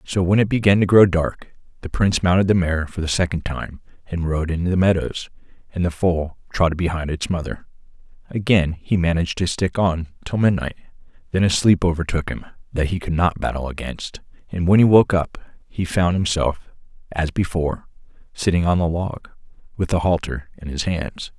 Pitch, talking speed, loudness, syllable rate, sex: 85 Hz, 190 wpm, -20 LUFS, 5.3 syllables/s, male